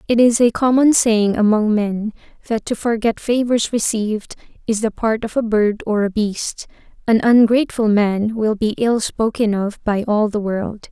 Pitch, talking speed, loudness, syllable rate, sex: 220 Hz, 180 wpm, -17 LUFS, 4.5 syllables/s, female